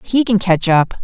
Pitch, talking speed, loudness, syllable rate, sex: 195 Hz, 230 wpm, -14 LUFS, 4.5 syllables/s, female